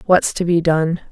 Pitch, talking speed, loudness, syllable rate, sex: 170 Hz, 215 wpm, -17 LUFS, 4.5 syllables/s, female